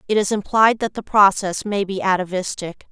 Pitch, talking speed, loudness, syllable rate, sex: 200 Hz, 185 wpm, -19 LUFS, 5.2 syllables/s, female